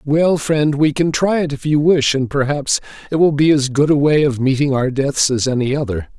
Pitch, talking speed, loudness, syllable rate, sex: 145 Hz, 245 wpm, -16 LUFS, 5.1 syllables/s, male